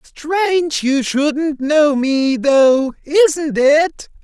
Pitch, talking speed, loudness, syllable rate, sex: 295 Hz, 115 wpm, -15 LUFS, 2.3 syllables/s, male